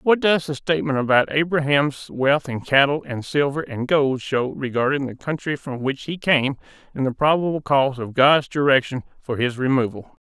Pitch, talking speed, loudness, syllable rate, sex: 140 Hz, 180 wpm, -21 LUFS, 5.0 syllables/s, male